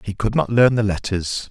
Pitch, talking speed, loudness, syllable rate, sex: 105 Hz, 240 wpm, -19 LUFS, 5.0 syllables/s, male